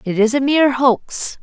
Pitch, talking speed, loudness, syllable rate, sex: 250 Hz, 210 wpm, -16 LUFS, 4.5 syllables/s, female